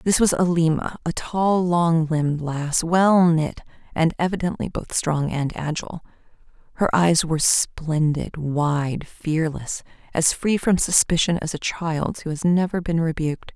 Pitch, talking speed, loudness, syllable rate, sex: 165 Hz, 150 wpm, -21 LUFS, 4.2 syllables/s, female